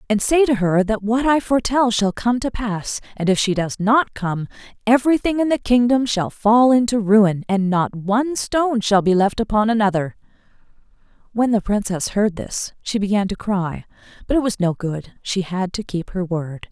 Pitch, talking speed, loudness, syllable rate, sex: 215 Hz, 195 wpm, -19 LUFS, 4.9 syllables/s, female